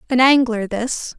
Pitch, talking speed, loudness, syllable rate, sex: 240 Hz, 150 wpm, -17 LUFS, 4.1 syllables/s, female